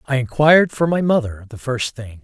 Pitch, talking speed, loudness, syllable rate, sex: 130 Hz, 215 wpm, -17 LUFS, 5.4 syllables/s, male